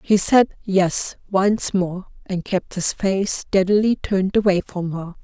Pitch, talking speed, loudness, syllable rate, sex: 190 Hz, 150 wpm, -20 LUFS, 3.8 syllables/s, female